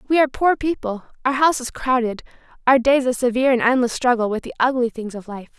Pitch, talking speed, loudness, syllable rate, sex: 250 Hz, 225 wpm, -19 LUFS, 6.5 syllables/s, female